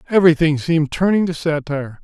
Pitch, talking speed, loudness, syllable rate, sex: 160 Hz, 145 wpm, -17 LUFS, 6.6 syllables/s, male